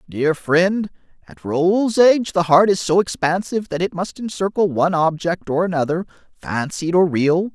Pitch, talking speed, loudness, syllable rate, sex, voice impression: 175 Hz, 165 wpm, -18 LUFS, 4.8 syllables/s, male, masculine, adult-like, tensed, bright, clear, fluent, intellectual, friendly, unique, wild, lively, slightly sharp